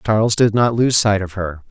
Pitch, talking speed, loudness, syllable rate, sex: 105 Hz, 245 wpm, -16 LUFS, 5.2 syllables/s, male